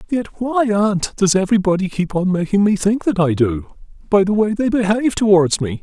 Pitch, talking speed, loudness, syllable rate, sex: 195 Hz, 205 wpm, -17 LUFS, 5.3 syllables/s, male